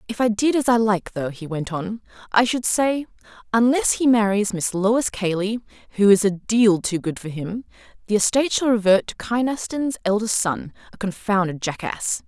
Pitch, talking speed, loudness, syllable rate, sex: 215 Hz, 185 wpm, -21 LUFS, 4.4 syllables/s, female